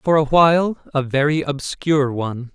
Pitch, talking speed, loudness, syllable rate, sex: 145 Hz, 140 wpm, -18 LUFS, 5.0 syllables/s, male